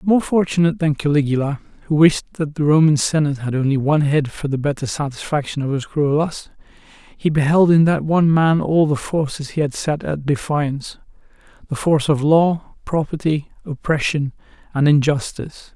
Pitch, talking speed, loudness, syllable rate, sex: 150 Hz, 170 wpm, -18 LUFS, 5.3 syllables/s, male